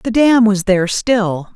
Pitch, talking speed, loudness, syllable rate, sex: 210 Hz, 195 wpm, -14 LUFS, 4.0 syllables/s, female